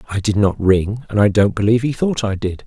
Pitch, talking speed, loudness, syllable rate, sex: 105 Hz, 270 wpm, -17 LUFS, 5.8 syllables/s, male